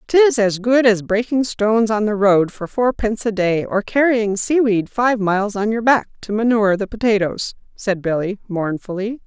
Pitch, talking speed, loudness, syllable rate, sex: 215 Hz, 195 wpm, -18 LUFS, 4.8 syllables/s, female